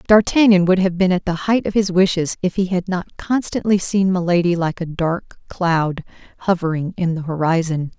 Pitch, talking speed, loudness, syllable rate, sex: 180 Hz, 190 wpm, -18 LUFS, 5.0 syllables/s, female